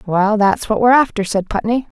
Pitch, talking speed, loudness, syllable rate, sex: 220 Hz, 210 wpm, -15 LUFS, 5.7 syllables/s, female